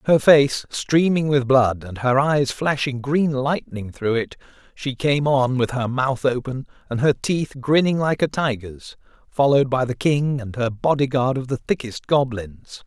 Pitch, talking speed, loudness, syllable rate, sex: 135 Hz, 175 wpm, -20 LUFS, 4.3 syllables/s, male